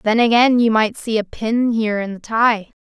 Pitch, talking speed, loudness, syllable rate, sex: 225 Hz, 235 wpm, -17 LUFS, 4.8 syllables/s, female